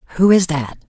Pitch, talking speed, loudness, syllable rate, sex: 165 Hz, 190 wpm, -15 LUFS, 6.0 syllables/s, female